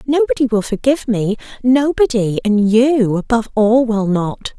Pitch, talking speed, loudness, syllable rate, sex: 230 Hz, 145 wpm, -15 LUFS, 4.6 syllables/s, female